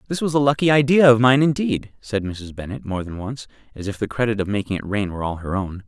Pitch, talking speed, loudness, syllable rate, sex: 115 Hz, 265 wpm, -20 LUFS, 6.2 syllables/s, male